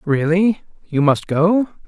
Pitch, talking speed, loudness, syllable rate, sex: 175 Hz, 95 wpm, -17 LUFS, 3.6 syllables/s, male